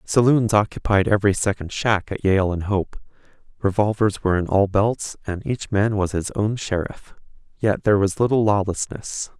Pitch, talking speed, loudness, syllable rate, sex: 100 Hz, 165 wpm, -21 LUFS, 4.9 syllables/s, male